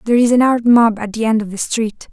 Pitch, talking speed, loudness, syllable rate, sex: 225 Hz, 310 wpm, -15 LUFS, 6.6 syllables/s, female